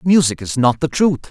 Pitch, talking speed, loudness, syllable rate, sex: 140 Hz, 230 wpm, -16 LUFS, 5.4 syllables/s, male